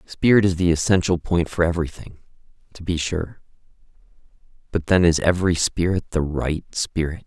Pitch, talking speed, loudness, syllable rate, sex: 85 Hz, 150 wpm, -21 LUFS, 5.3 syllables/s, male